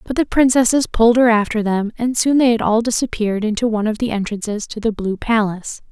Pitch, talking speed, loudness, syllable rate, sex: 225 Hz, 225 wpm, -17 LUFS, 6.1 syllables/s, female